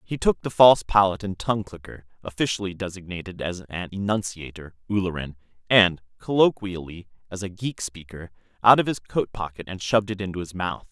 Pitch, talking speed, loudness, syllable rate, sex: 95 Hz, 170 wpm, -23 LUFS, 5.7 syllables/s, male